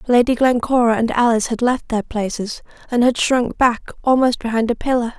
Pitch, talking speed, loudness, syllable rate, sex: 240 Hz, 185 wpm, -18 LUFS, 5.5 syllables/s, female